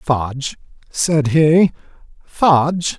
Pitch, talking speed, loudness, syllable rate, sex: 150 Hz, 80 wpm, -16 LUFS, 2.8 syllables/s, male